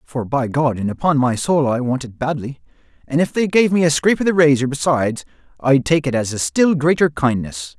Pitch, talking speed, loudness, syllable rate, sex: 140 Hz, 230 wpm, -17 LUFS, 5.5 syllables/s, male